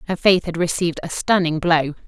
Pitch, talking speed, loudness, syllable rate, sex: 170 Hz, 205 wpm, -19 LUFS, 5.7 syllables/s, female